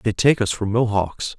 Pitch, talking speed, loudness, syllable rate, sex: 110 Hz, 215 wpm, -20 LUFS, 4.7 syllables/s, male